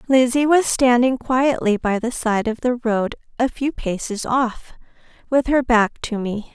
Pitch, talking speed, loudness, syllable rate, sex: 240 Hz, 175 wpm, -19 LUFS, 4.2 syllables/s, female